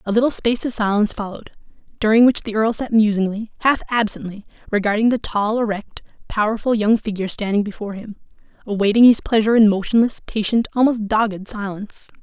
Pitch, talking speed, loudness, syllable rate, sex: 215 Hz, 160 wpm, -19 LUFS, 6.4 syllables/s, female